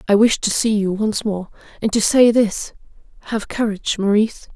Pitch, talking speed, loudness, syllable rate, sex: 215 Hz, 185 wpm, -18 LUFS, 5.2 syllables/s, female